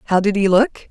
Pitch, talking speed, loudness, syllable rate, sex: 195 Hz, 265 wpm, -16 LUFS, 5.8 syllables/s, female